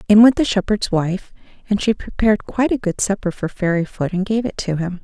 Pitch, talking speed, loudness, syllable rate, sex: 195 Hz, 225 wpm, -19 LUFS, 5.8 syllables/s, female